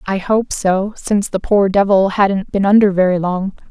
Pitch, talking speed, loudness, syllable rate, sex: 195 Hz, 195 wpm, -15 LUFS, 5.0 syllables/s, female